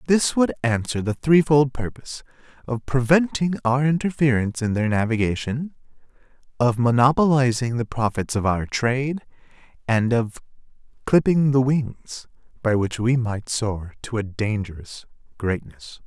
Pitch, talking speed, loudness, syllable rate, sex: 125 Hz, 125 wpm, -22 LUFS, 4.6 syllables/s, male